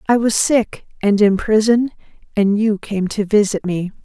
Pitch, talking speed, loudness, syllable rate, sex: 210 Hz, 180 wpm, -17 LUFS, 4.4 syllables/s, female